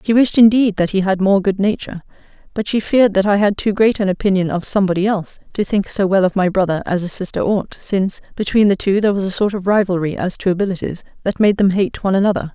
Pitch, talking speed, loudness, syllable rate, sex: 195 Hz, 250 wpm, -16 LUFS, 6.6 syllables/s, female